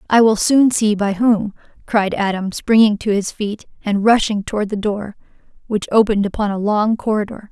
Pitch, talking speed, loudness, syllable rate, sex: 210 Hz, 185 wpm, -17 LUFS, 5.1 syllables/s, female